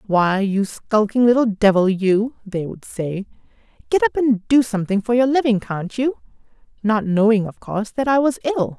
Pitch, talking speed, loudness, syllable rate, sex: 220 Hz, 180 wpm, -19 LUFS, 4.8 syllables/s, female